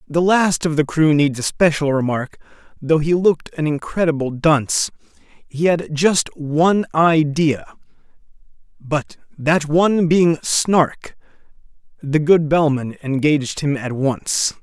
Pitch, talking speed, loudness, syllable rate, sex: 155 Hz, 125 wpm, -18 LUFS, 3.9 syllables/s, male